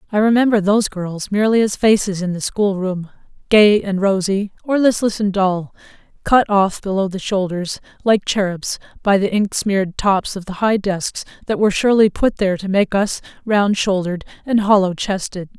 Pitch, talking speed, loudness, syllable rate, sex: 200 Hz, 175 wpm, -17 LUFS, 5.1 syllables/s, female